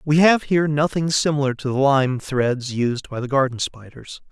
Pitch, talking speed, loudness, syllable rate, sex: 140 Hz, 195 wpm, -20 LUFS, 4.8 syllables/s, male